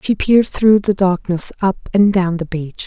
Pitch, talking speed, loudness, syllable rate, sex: 190 Hz, 210 wpm, -15 LUFS, 4.6 syllables/s, female